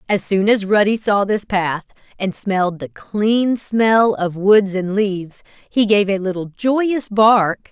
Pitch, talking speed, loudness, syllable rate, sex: 205 Hz, 170 wpm, -17 LUFS, 3.7 syllables/s, female